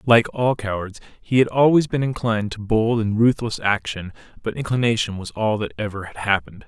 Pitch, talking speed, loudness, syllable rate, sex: 110 Hz, 190 wpm, -21 LUFS, 5.5 syllables/s, male